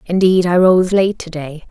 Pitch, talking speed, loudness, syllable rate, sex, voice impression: 175 Hz, 210 wpm, -13 LUFS, 4.6 syllables/s, female, feminine, adult-like, tensed, powerful, bright, clear, fluent, intellectual, friendly, lively, slightly sharp